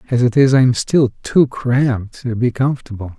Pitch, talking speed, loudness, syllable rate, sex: 120 Hz, 205 wpm, -16 LUFS, 5.3 syllables/s, male